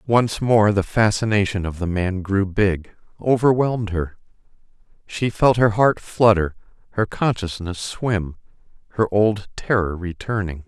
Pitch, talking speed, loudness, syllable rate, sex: 100 Hz, 130 wpm, -20 LUFS, 4.2 syllables/s, male